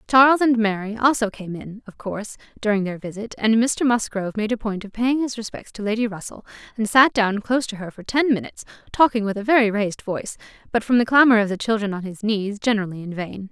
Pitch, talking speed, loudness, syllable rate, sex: 220 Hz, 230 wpm, -21 LUFS, 6.2 syllables/s, female